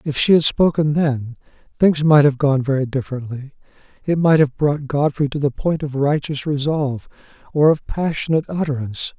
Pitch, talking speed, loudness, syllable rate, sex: 145 Hz, 170 wpm, -18 LUFS, 5.3 syllables/s, male